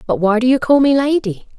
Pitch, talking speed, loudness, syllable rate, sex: 240 Hz, 265 wpm, -14 LUFS, 5.8 syllables/s, female